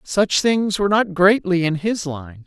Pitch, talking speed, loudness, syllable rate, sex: 190 Hz, 195 wpm, -18 LUFS, 4.2 syllables/s, female